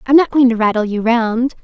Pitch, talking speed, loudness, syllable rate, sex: 240 Hz, 255 wpm, -14 LUFS, 5.5 syllables/s, female